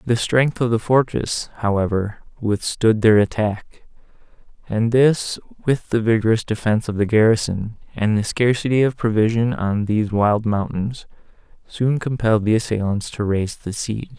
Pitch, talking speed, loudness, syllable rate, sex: 110 Hz, 150 wpm, -19 LUFS, 4.9 syllables/s, male